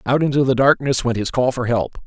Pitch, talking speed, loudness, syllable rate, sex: 125 Hz, 260 wpm, -18 LUFS, 5.8 syllables/s, male